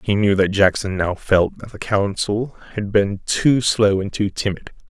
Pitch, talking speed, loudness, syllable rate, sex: 100 Hz, 195 wpm, -19 LUFS, 4.3 syllables/s, male